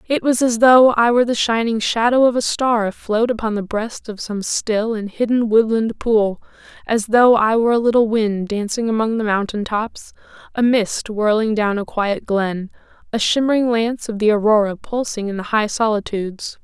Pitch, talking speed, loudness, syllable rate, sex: 220 Hz, 190 wpm, -18 LUFS, 5.0 syllables/s, female